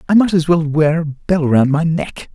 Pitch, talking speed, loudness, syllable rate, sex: 160 Hz, 255 wpm, -15 LUFS, 4.7 syllables/s, male